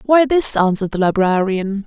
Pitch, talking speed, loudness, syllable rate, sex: 215 Hz, 160 wpm, -16 LUFS, 5.1 syllables/s, female